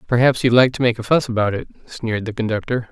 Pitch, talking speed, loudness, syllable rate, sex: 120 Hz, 245 wpm, -18 LUFS, 6.6 syllables/s, male